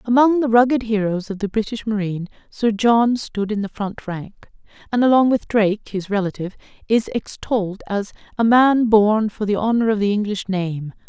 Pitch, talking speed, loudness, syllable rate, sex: 215 Hz, 185 wpm, -19 LUFS, 5.2 syllables/s, female